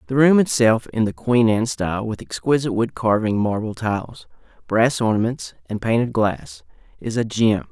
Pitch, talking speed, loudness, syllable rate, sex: 115 Hz, 170 wpm, -20 LUFS, 5.1 syllables/s, male